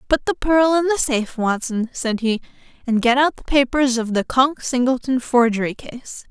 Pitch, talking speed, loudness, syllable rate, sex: 255 Hz, 190 wpm, -19 LUFS, 4.9 syllables/s, female